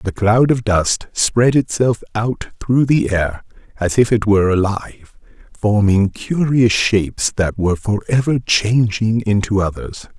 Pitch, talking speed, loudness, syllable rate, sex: 110 Hz, 145 wpm, -16 LUFS, 4.1 syllables/s, male